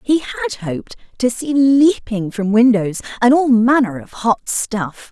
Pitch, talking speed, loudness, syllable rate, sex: 240 Hz, 165 wpm, -16 LUFS, 4.0 syllables/s, female